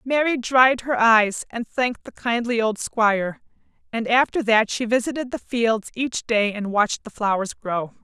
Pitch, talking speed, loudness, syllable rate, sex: 230 Hz, 180 wpm, -21 LUFS, 4.5 syllables/s, female